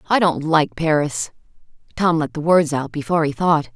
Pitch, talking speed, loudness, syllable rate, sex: 155 Hz, 190 wpm, -19 LUFS, 5.1 syllables/s, female